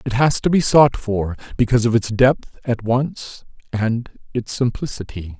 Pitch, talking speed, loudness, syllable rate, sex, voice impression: 115 Hz, 165 wpm, -19 LUFS, 4.4 syllables/s, male, very masculine, very adult-like, very middle-aged, very thick, tensed, slightly powerful, slightly bright, hard, slightly clear, slightly fluent, slightly raspy, very cool, slightly intellectual, sincere, slightly calm, very mature, friendly, slightly reassuring, very unique, very wild, lively, strict, intense